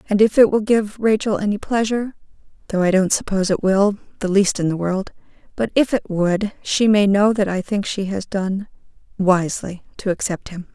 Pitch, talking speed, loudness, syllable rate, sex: 200 Hz, 195 wpm, -19 LUFS, 5.2 syllables/s, female